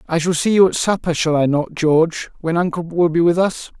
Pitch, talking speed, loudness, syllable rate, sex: 165 Hz, 255 wpm, -17 LUFS, 5.6 syllables/s, male